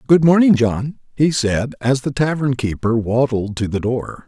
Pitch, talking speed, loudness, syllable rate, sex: 130 Hz, 180 wpm, -17 LUFS, 4.4 syllables/s, male